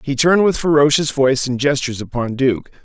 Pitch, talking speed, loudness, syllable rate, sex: 140 Hz, 190 wpm, -16 LUFS, 6.1 syllables/s, male